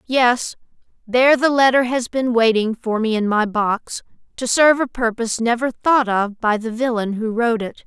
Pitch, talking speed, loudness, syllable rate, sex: 235 Hz, 190 wpm, -18 LUFS, 4.9 syllables/s, female